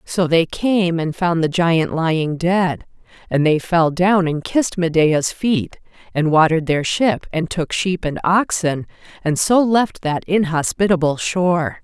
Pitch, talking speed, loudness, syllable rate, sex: 170 Hz, 160 wpm, -18 LUFS, 4.1 syllables/s, female